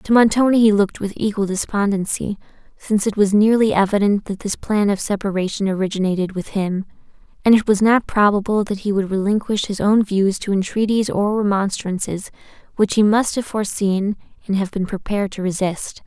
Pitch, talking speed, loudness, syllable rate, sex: 205 Hz, 175 wpm, -19 LUFS, 5.5 syllables/s, female